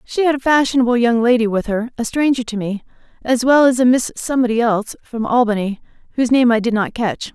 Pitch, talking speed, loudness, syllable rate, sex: 240 Hz, 220 wpm, -16 LUFS, 6.2 syllables/s, female